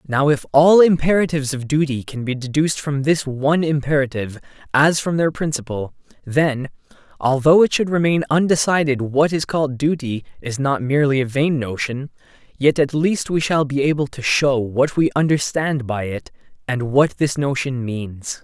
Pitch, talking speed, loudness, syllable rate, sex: 140 Hz, 170 wpm, -18 LUFS, 5.0 syllables/s, male